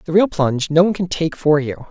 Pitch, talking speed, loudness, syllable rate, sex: 160 Hz, 285 wpm, -17 LUFS, 5.9 syllables/s, male